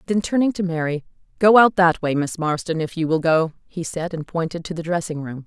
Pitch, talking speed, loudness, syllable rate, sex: 170 Hz, 240 wpm, -21 LUFS, 5.6 syllables/s, female